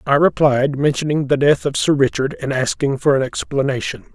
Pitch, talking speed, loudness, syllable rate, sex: 140 Hz, 190 wpm, -17 LUFS, 5.3 syllables/s, male